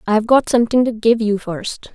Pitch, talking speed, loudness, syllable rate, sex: 225 Hz, 215 wpm, -16 LUFS, 5.5 syllables/s, female